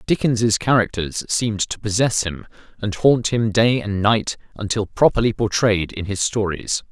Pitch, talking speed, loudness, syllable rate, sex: 110 Hz, 155 wpm, -20 LUFS, 4.5 syllables/s, male